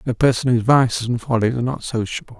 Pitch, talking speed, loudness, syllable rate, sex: 120 Hz, 225 wpm, -19 LUFS, 7.1 syllables/s, male